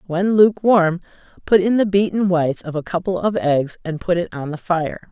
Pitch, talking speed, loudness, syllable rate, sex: 180 Hz, 210 wpm, -18 LUFS, 5.2 syllables/s, female